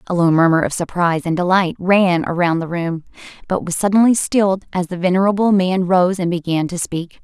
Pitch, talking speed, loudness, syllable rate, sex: 180 Hz, 200 wpm, -17 LUFS, 5.3 syllables/s, female